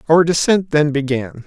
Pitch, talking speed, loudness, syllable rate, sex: 150 Hz, 165 wpm, -16 LUFS, 4.7 syllables/s, male